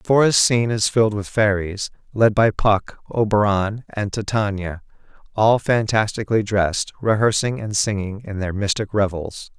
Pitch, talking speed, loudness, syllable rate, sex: 105 Hz, 145 wpm, -20 LUFS, 4.8 syllables/s, male